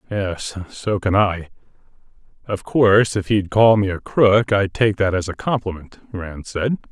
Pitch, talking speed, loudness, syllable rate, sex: 100 Hz, 175 wpm, -19 LUFS, 4.3 syllables/s, male